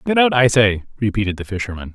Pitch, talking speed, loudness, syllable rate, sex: 115 Hz, 215 wpm, -18 LUFS, 6.6 syllables/s, male